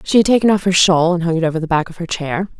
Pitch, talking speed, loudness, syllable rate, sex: 175 Hz, 345 wpm, -15 LUFS, 7.1 syllables/s, female